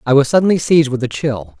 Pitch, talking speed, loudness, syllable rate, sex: 140 Hz, 265 wpm, -15 LUFS, 6.9 syllables/s, male